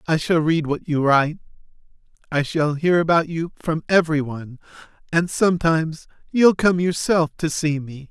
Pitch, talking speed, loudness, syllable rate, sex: 160 Hz, 155 wpm, -20 LUFS, 4.9 syllables/s, male